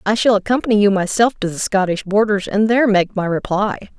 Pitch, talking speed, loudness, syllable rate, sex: 205 Hz, 210 wpm, -17 LUFS, 5.7 syllables/s, female